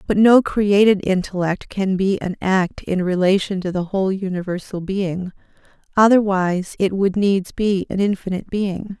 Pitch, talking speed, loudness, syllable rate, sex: 190 Hz, 155 wpm, -19 LUFS, 4.7 syllables/s, female